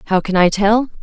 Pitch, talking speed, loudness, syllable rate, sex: 205 Hz, 235 wpm, -15 LUFS, 5.5 syllables/s, female